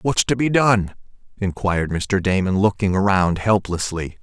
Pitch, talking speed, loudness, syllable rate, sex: 100 Hz, 140 wpm, -19 LUFS, 4.5 syllables/s, male